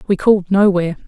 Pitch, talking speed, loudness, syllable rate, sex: 190 Hz, 170 wpm, -14 LUFS, 7.1 syllables/s, female